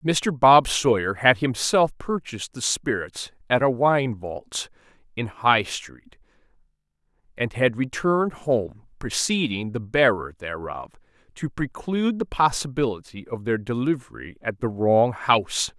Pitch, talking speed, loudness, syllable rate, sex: 125 Hz, 130 wpm, -23 LUFS, 4.1 syllables/s, male